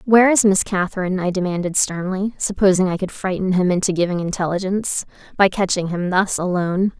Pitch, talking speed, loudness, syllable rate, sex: 185 Hz, 170 wpm, -19 LUFS, 6.0 syllables/s, female